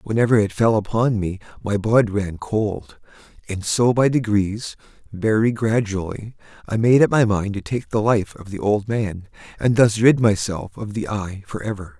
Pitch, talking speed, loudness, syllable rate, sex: 105 Hz, 170 wpm, -20 LUFS, 4.5 syllables/s, male